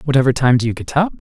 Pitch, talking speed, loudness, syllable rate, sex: 135 Hz, 265 wpm, -17 LUFS, 7.3 syllables/s, male